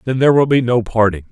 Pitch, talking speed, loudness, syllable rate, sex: 120 Hz, 275 wpm, -14 LUFS, 7.0 syllables/s, male